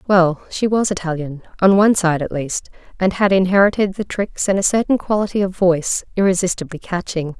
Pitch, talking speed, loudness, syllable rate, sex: 185 Hz, 170 wpm, -18 LUFS, 5.6 syllables/s, female